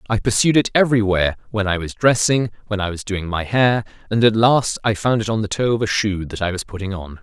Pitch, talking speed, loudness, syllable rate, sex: 105 Hz, 250 wpm, -19 LUFS, 6.0 syllables/s, male